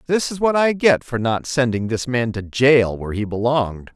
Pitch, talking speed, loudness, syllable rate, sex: 125 Hz, 225 wpm, -19 LUFS, 5.1 syllables/s, male